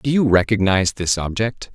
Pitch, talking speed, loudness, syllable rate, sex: 105 Hz, 170 wpm, -18 LUFS, 5.3 syllables/s, male